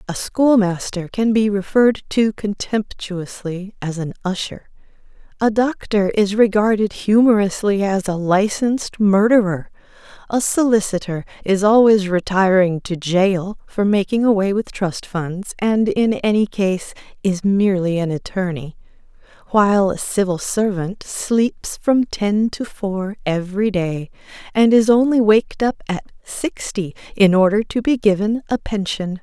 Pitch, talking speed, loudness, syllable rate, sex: 200 Hz, 135 wpm, -18 LUFS, 4.3 syllables/s, female